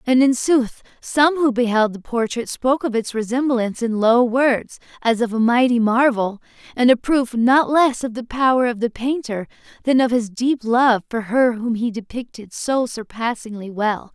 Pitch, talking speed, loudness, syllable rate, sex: 240 Hz, 185 wpm, -19 LUFS, 4.6 syllables/s, female